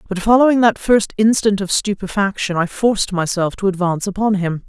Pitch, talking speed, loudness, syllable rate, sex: 200 Hz, 180 wpm, -17 LUFS, 5.6 syllables/s, female